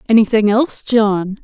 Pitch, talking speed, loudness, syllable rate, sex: 215 Hz, 125 wpm, -14 LUFS, 4.9 syllables/s, female